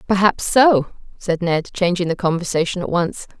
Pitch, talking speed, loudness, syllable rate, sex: 180 Hz, 160 wpm, -18 LUFS, 4.9 syllables/s, female